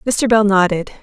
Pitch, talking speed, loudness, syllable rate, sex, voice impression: 210 Hz, 175 wpm, -14 LUFS, 4.4 syllables/s, female, feminine, adult-like, slightly muffled, calm, elegant, slightly sweet